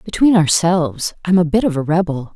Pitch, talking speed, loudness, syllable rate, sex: 170 Hz, 230 wpm, -16 LUFS, 6.1 syllables/s, female